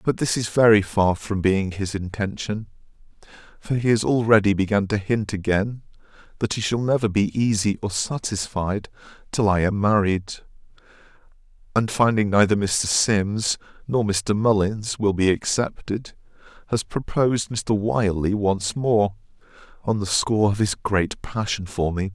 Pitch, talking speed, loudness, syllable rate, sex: 105 Hz, 150 wpm, -22 LUFS, 4.5 syllables/s, male